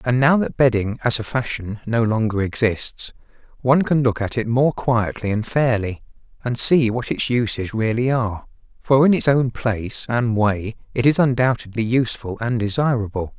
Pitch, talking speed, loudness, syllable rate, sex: 120 Hz, 175 wpm, -20 LUFS, 4.9 syllables/s, male